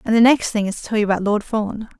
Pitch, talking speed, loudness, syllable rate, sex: 215 Hz, 330 wpm, -19 LUFS, 6.6 syllables/s, female